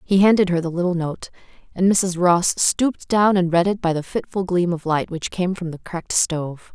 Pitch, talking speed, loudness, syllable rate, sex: 180 Hz, 230 wpm, -20 LUFS, 5.1 syllables/s, female